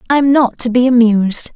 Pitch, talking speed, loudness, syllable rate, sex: 240 Hz, 195 wpm, -12 LUFS, 5.2 syllables/s, female